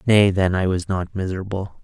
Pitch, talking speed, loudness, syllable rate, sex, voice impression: 95 Hz, 195 wpm, -21 LUFS, 5.3 syllables/s, male, masculine, adult-like, tensed, slightly weak, slightly soft, slightly halting, cool, intellectual, calm, slightly mature, friendly, wild, slightly kind, modest